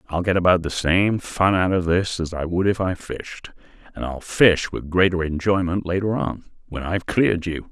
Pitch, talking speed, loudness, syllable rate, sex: 90 Hz, 195 wpm, -21 LUFS, 4.9 syllables/s, male